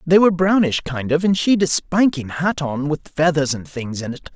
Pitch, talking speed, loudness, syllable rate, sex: 155 Hz, 235 wpm, -19 LUFS, 5.0 syllables/s, male